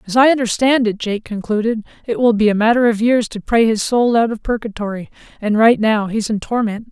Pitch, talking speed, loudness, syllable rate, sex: 225 Hz, 225 wpm, -16 LUFS, 5.6 syllables/s, female